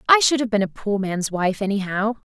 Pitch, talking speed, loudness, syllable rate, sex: 210 Hz, 260 wpm, -21 LUFS, 5.3 syllables/s, female